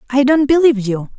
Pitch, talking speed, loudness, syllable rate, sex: 255 Hz, 205 wpm, -14 LUFS, 6.3 syllables/s, female